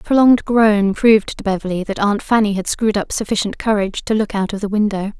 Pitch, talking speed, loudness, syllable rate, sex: 210 Hz, 230 wpm, -17 LUFS, 6.3 syllables/s, female